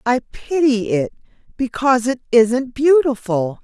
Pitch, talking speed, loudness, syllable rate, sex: 240 Hz, 115 wpm, -17 LUFS, 4.1 syllables/s, female